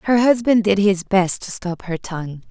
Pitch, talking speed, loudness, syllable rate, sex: 195 Hz, 215 wpm, -19 LUFS, 4.8 syllables/s, female